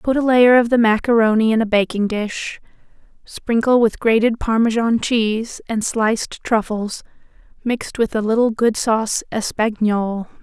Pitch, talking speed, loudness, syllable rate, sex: 225 Hz, 145 wpm, -18 LUFS, 4.7 syllables/s, female